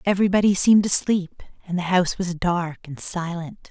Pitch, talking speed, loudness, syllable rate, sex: 180 Hz, 160 wpm, -21 LUFS, 5.7 syllables/s, female